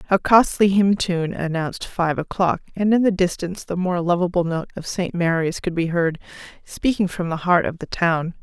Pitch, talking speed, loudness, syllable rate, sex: 175 Hz, 200 wpm, -21 LUFS, 5.1 syllables/s, female